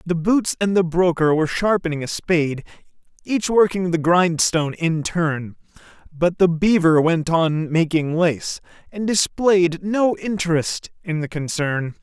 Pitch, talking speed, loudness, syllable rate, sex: 170 Hz, 145 wpm, -19 LUFS, 4.2 syllables/s, male